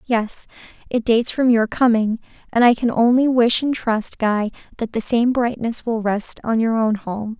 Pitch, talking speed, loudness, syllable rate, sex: 230 Hz, 195 wpm, -19 LUFS, 4.6 syllables/s, female